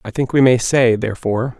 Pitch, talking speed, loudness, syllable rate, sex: 120 Hz, 225 wpm, -16 LUFS, 6.0 syllables/s, male